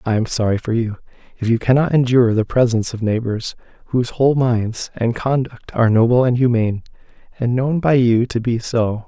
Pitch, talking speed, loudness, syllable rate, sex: 120 Hz, 190 wpm, -18 LUFS, 5.7 syllables/s, male